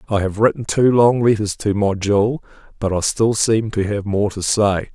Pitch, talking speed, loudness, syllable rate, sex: 105 Hz, 220 wpm, -18 LUFS, 4.8 syllables/s, male